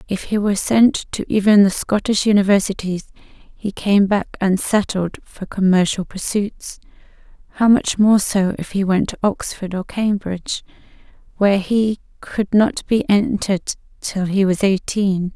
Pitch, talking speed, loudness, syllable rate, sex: 200 Hz, 145 wpm, -18 LUFS, 4.3 syllables/s, female